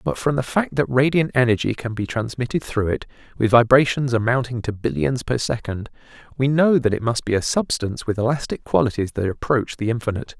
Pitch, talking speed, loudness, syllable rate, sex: 120 Hz, 195 wpm, -21 LUFS, 5.8 syllables/s, male